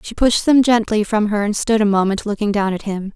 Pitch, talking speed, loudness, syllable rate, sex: 210 Hz, 265 wpm, -17 LUFS, 5.6 syllables/s, female